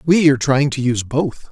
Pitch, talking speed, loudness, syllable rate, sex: 140 Hz, 235 wpm, -17 LUFS, 5.8 syllables/s, male